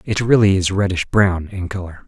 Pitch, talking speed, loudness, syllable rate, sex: 95 Hz, 200 wpm, -17 LUFS, 5.1 syllables/s, male